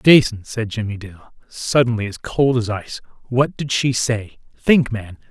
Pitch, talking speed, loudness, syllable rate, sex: 115 Hz, 170 wpm, -19 LUFS, 4.4 syllables/s, male